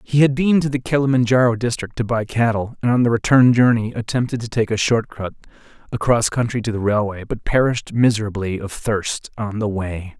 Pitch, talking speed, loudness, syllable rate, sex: 115 Hz, 205 wpm, -19 LUFS, 5.6 syllables/s, male